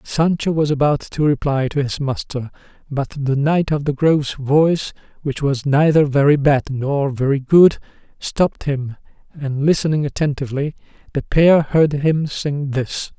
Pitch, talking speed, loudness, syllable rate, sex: 145 Hz, 155 wpm, -18 LUFS, 4.5 syllables/s, male